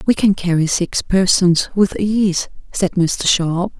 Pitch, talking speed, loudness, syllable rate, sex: 185 Hz, 160 wpm, -16 LUFS, 3.6 syllables/s, female